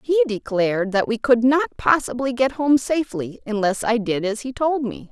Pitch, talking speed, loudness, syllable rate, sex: 240 Hz, 200 wpm, -20 LUFS, 5.1 syllables/s, female